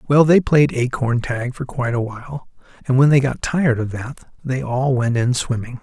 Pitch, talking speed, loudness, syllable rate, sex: 130 Hz, 215 wpm, -18 LUFS, 5.0 syllables/s, male